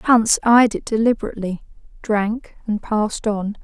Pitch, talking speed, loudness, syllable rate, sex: 220 Hz, 130 wpm, -19 LUFS, 4.6 syllables/s, female